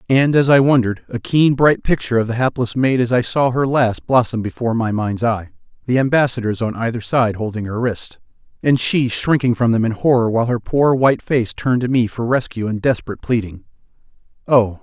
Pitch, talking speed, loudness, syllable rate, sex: 120 Hz, 200 wpm, -17 LUFS, 5.8 syllables/s, male